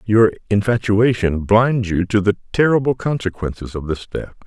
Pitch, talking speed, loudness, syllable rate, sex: 105 Hz, 150 wpm, -18 LUFS, 4.7 syllables/s, male